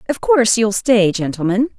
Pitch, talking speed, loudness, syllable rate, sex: 225 Hz, 170 wpm, -15 LUFS, 5.3 syllables/s, female